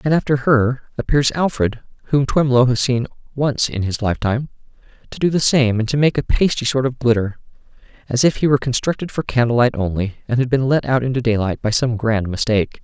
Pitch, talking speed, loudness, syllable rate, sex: 125 Hz, 210 wpm, -18 LUFS, 5.1 syllables/s, male